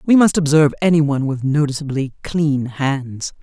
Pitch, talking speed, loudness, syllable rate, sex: 145 Hz, 140 wpm, -17 LUFS, 4.8 syllables/s, female